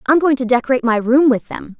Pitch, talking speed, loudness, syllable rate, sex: 255 Hz, 270 wpm, -15 LUFS, 6.6 syllables/s, female